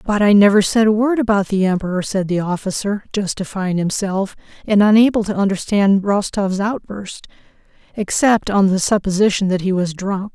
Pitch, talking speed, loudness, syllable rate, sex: 200 Hz, 160 wpm, -17 LUFS, 5.1 syllables/s, female